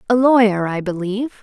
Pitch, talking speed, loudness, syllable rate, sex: 215 Hz, 170 wpm, -17 LUFS, 5.6 syllables/s, female